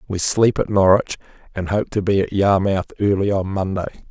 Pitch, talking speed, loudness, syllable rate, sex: 100 Hz, 190 wpm, -19 LUFS, 5.4 syllables/s, male